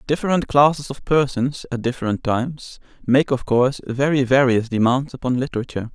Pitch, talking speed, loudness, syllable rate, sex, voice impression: 130 Hz, 150 wpm, -20 LUFS, 5.6 syllables/s, male, masculine, adult-like, slightly soft, slightly fluent, slightly calm, friendly, slightly reassuring, kind